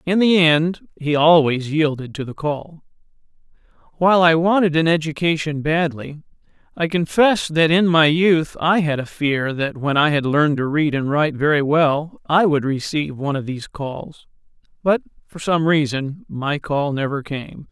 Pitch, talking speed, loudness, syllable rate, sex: 155 Hz, 175 wpm, -18 LUFS, 4.7 syllables/s, male